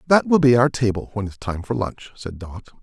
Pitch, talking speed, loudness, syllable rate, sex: 115 Hz, 255 wpm, -20 LUFS, 5.3 syllables/s, male